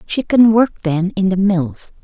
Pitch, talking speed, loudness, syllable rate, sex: 195 Hz, 175 wpm, -15 LUFS, 4.1 syllables/s, female